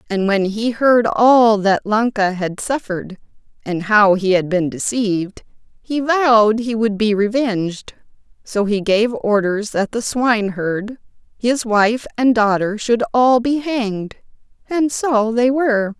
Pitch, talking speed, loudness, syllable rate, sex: 220 Hz, 150 wpm, -17 LUFS, 4.1 syllables/s, female